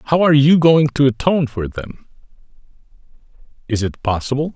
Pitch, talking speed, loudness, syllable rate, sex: 135 Hz, 145 wpm, -16 LUFS, 5.6 syllables/s, male